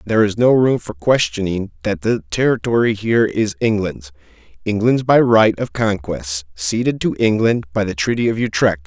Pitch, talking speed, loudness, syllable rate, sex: 105 Hz, 160 wpm, -17 LUFS, 5.0 syllables/s, male